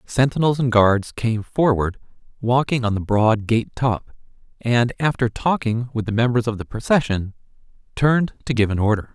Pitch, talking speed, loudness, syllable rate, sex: 115 Hz, 165 wpm, -20 LUFS, 4.9 syllables/s, male